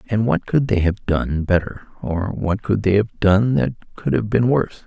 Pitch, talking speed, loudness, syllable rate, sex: 105 Hz, 220 wpm, -19 LUFS, 4.5 syllables/s, male